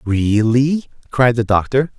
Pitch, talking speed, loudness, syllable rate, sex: 120 Hz, 120 wpm, -16 LUFS, 3.8 syllables/s, male